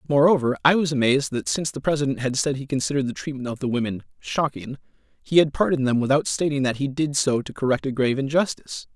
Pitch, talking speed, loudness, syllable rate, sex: 140 Hz, 220 wpm, -22 LUFS, 6.8 syllables/s, male